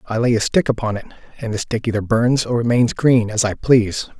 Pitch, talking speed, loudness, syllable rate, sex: 115 Hz, 245 wpm, -18 LUFS, 5.8 syllables/s, male